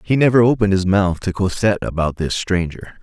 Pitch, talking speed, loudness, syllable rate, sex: 100 Hz, 200 wpm, -17 LUFS, 5.9 syllables/s, male